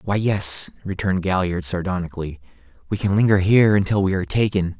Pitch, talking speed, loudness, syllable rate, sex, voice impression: 95 Hz, 165 wpm, -20 LUFS, 6.1 syllables/s, male, very masculine, slightly young, slightly adult-like, thick, tensed, powerful, bright, hard, clear, fluent, slightly raspy, cool, very intellectual, refreshing, very sincere, very calm, slightly mature, friendly, very reassuring, slightly unique, wild, slightly sweet, slightly lively, very kind, slightly modest